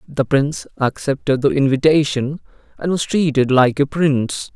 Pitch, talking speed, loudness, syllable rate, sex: 140 Hz, 145 wpm, -17 LUFS, 4.8 syllables/s, male